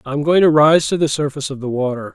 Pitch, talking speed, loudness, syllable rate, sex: 145 Hz, 280 wpm, -16 LUFS, 6.3 syllables/s, male